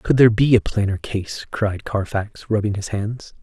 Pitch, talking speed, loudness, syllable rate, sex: 105 Hz, 195 wpm, -20 LUFS, 4.6 syllables/s, male